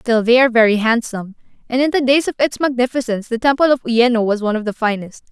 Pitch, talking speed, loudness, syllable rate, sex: 240 Hz, 235 wpm, -16 LUFS, 6.9 syllables/s, female